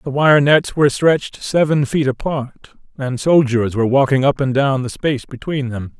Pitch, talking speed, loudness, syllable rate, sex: 135 Hz, 190 wpm, -16 LUFS, 5.0 syllables/s, male